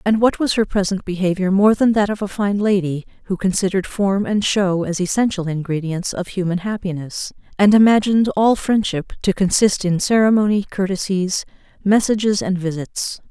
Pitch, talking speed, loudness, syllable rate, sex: 195 Hz, 160 wpm, -18 LUFS, 5.2 syllables/s, female